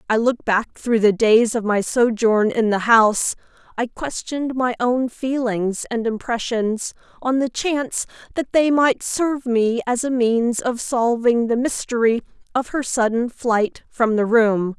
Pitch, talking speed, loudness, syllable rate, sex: 235 Hz, 165 wpm, -20 LUFS, 4.3 syllables/s, female